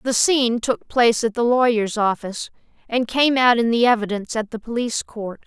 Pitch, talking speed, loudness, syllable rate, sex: 230 Hz, 200 wpm, -19 LUFS, 5.7 syllables/s, female